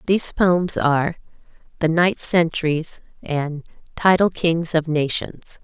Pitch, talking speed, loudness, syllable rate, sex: 165 Hz, 115 wpm, -20 LUFS, 3.8 syllables/s, female